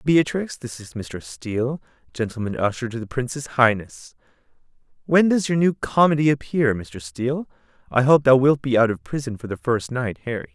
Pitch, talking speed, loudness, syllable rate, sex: 130 Hz, 180 wpm, -21 LUFS, 5.2 syllables/s, male